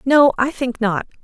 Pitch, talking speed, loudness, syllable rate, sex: 250 Hz, 195 wpm, -17 LUFS, 4.2 syllables/s, female